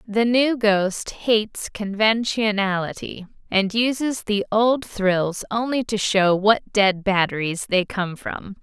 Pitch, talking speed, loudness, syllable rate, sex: 210 Hz, 130 wpm, -21 LUFS, 3.6 syllables/s, female